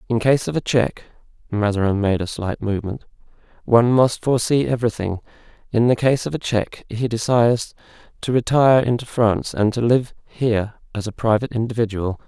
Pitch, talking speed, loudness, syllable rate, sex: 115 Hz, 165 wpm, -20 LUFS, 5.1 syllables/s, male